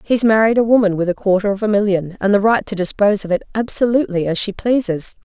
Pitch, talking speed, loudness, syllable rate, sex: 205 Hz, 240 wpm, -16 LUFS, 6.5 syllables/s, female